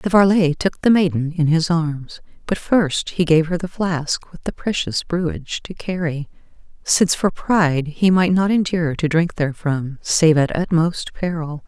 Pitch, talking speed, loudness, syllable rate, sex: 170 Hz, 180 wpm, -19 LUFS, 4.5 syllables/s, female